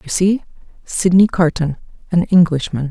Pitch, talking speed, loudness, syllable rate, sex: 170 Hz, 105 wpm, -16 LUFS, 4.7 syllables/s, female